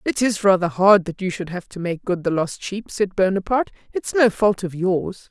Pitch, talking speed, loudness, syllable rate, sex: 190 Hz, 250 wpm, -20 LUFS, 5.2 syllables/s, female